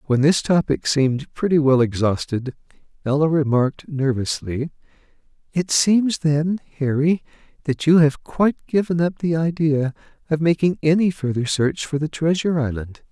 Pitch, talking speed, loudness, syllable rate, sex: 150 Hz, 140 wpm, -20 LUFS, 4.7 syllables/s, male